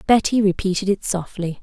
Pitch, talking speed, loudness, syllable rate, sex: 195 Hz, 150 wpm, -20 LUFS, 5.4 syllables/s, female